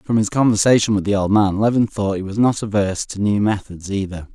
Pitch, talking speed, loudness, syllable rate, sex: 105 Hz, 235 wpm, -18 LUFS, 5.9 syllables/s, male